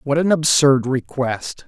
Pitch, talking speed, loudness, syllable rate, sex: 140 Hz, 145 wpm, -18 LUFS, 3.8 syllables/s, male